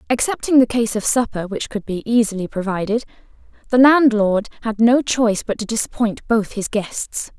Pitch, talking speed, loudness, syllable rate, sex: 225 Hz, 170 wpm, -18 LUFS, 5.1 syllables/s, female